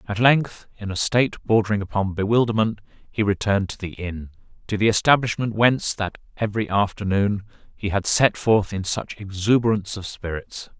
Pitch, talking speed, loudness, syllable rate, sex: 105 Hz, 155 wpm, -22 LUFS, 5.5 syllables/s, male